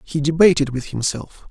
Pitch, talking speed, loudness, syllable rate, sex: 150 Hz, 160 wpm, -18 LUFS, 5.2 syllables/s, male